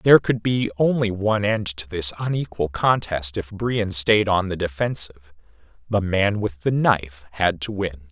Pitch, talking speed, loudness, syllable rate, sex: 95 Hz, 180 wpm, -22 LUFS, 4.8 syllables/s, male